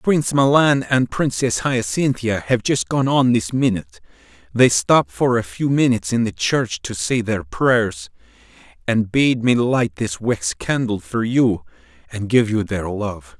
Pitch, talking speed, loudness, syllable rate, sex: 110 Hz, 170 wpm, -19 LUFS, 4.3 syllables/s, male